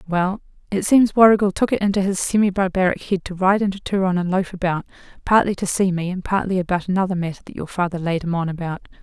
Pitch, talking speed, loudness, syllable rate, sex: 185 Hz, 225 wpm, -20 LUFS, 6.5 syllables/s, female